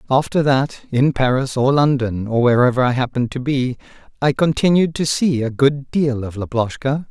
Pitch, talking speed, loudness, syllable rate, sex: 135 Hz, 175 wpm, -18 LUFS, 5.0 syllables/s, male